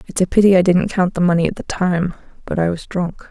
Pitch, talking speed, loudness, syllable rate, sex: 180 Hz, 270 wpm, -17 LUFS, 5.9 syllables/s, female